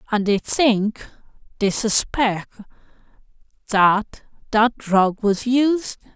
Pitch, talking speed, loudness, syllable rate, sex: 220 Hz, 80 wpm, -19 LUFS, 2.9 syllables/s, female